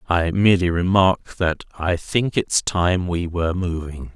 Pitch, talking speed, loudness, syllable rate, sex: 90 Hz, 160 wpm, -20 LUFS, 4.2 syllables/s, male